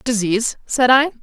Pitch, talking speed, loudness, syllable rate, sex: 240 Hz, 145 wpm, -17 LUFS, 4.9 syllables/s, female